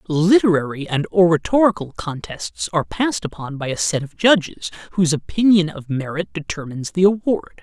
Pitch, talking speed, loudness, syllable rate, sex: 165 Hz, 150 wpm, -19 LUFS, 5.6 syllables/s, male